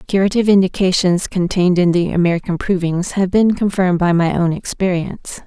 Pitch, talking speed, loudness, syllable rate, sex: 180 Hz, 165 wpm, -16 LUFS, 5.9 syllables/s, female